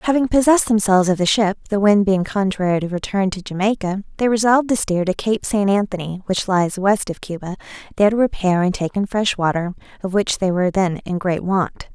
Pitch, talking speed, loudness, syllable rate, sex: 195 Hz, 215 wpm, -18 LUFS, 5.5 syllables/s, female